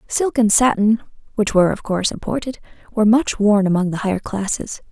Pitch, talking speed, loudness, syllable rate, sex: 210 Hz, 185 wpm, -18 LUFS, 5.9 syllables/s, female